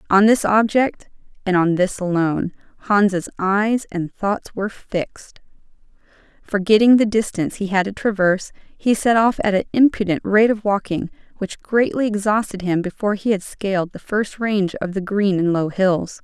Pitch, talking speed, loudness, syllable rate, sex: 200 Hz, 170 wpm, -19 LUFS, 4.9 syllables/s, female